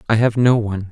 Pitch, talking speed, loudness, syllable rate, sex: 110 Hz, 265 wpm, -16 LUFS, 6.9 syllables/s, male